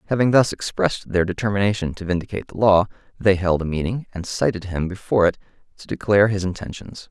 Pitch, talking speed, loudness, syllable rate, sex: 95 Hz, 185 wpm, -21 LUFS, 6.5 syllables/s, male